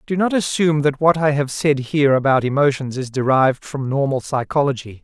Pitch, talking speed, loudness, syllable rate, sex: 140 Hz, 190 wpm, -18 LUFS, 5.7 syllables/s, male